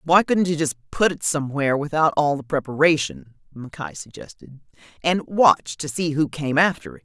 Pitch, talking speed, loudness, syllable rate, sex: 150 Hz, 180 wpm, -21 LUFS, 5.1 syllables/s, female